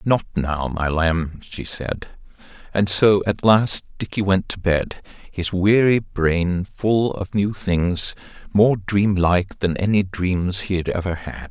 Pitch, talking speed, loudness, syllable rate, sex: 95 Hz, 160 wpm, -20 LUFS, 3.5 syllables/s, male